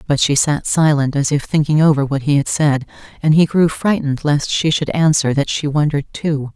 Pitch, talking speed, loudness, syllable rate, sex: 145 Hz, 220 wpm, -16 LUFS, 5.3 syllables/s, female